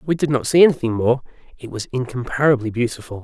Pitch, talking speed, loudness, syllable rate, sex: 130 Hz, 185 wpm, -19 LUFS, 6.4 syllables/s, male